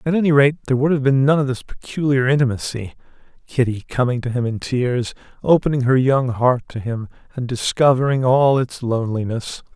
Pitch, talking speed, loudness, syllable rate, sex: 130 Hz, 170 wpm, -19 LUFS, 5.6 syllables/s, male